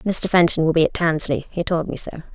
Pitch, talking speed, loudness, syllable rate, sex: 165 Hz, 255 wpm, -19 LUFS, 5.5 syllables/s, female